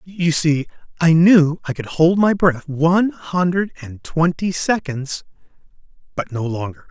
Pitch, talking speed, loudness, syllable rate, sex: 160 Hz, 150 wpm, -18 LUFS, 4.1 syllables/s, male